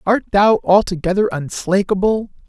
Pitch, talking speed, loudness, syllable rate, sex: 195 Hz, 95 wpm, -16 LUFS, 4.9 syllables/s, female